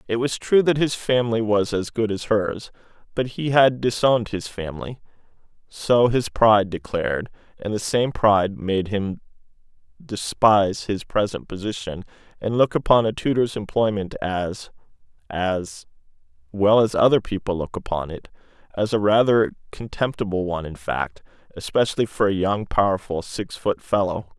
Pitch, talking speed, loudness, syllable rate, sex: 105 Hz, 150 wpm, -22 LUFS, 4.9 syllables/s, male